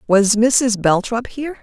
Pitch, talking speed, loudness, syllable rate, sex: 230 Hz, 145 wpm, -16 LUFS, 4.1 syllables/s, female